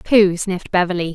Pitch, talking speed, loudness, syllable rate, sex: 185 Hz, 155 wpm, -18 LUFS, 5.7 syllables/s, female